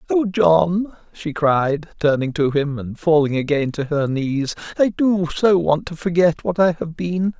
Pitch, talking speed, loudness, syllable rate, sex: 165 Hz, 185 wpm, -19 LUFS, 4.1 syllables/s, male